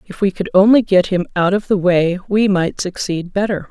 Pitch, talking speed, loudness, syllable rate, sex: 190 Hz, 225 wpm, -16 LUFS, 5.1 syllables/s, female